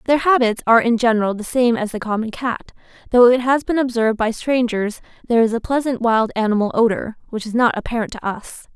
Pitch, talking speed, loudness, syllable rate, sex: 230 Hz, 210 wpm, -18 LUFS, 6.1 syllables/s, female